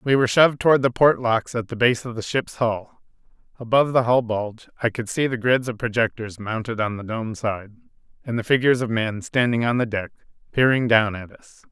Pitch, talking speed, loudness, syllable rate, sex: 115 Hz, 220 wpm, -21 LUFS, 5.7 syllables/s, male